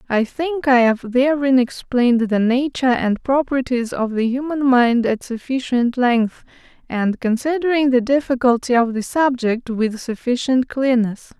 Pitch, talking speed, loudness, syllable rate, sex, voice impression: 250 Hz, 140 wpm, -18 LUFS, 4.4 syllables/s, female, feminine, middle-aged, slightly relaxed, bright, soft, halting, calm, friendly, reassuring, lively, kind, slightly modest